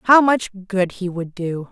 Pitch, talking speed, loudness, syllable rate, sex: 200 Hz, 210 wpm, -20 LUFS, 3.6 syllables/s, female